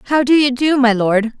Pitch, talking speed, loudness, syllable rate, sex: 255 Hz, 255 wpm, -14 LUFS, 5.2 syllables/s, female